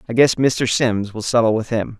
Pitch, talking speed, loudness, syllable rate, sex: 115 Hz, 240 wpm, -18 LUFS, 5.0 syllables/s, male